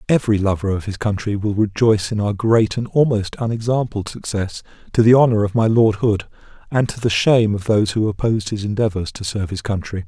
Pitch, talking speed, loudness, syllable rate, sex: 105 Hz, 210 wpm, -18 LUFS, 6.0 syllables/s, male